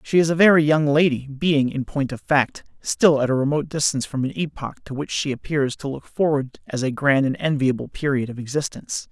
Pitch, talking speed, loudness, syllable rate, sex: 140 Hz, 225 wpm, -21 LUFS, 5.7 syllables/s, male